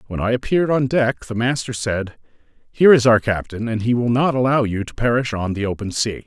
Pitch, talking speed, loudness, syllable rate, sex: 120 Hz, 230 wpm, -19 LUFS, 5.8 syllables/s, male